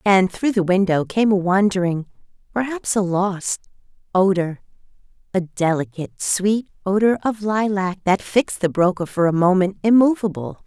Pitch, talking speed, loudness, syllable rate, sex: 190 Hz, 125 wpm, -19 LUFS, 4.8 syllables/s, female